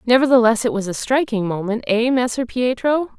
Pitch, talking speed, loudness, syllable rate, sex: 240 Hz, 170 wpm, -18 LUFS, 5.3 syllables/s, female